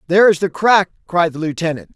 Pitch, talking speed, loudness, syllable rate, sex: 175 Hz, 215 wpm, -16 LUFS, 6.3 syllables/s, male